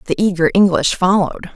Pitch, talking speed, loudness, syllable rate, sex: 185 Hz, 155 wpm, -15 LUFS, 6.1 syllables/s, female